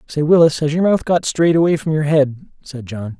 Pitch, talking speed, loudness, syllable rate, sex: 150 Hz, 245 wpm, -16 LUFS, 5.4 syllables/s, male